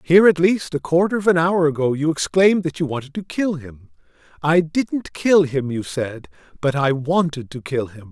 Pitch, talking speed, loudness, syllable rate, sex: 155 Hz, 215 wpm, -19 LUFS, 5.0 syllables/s, male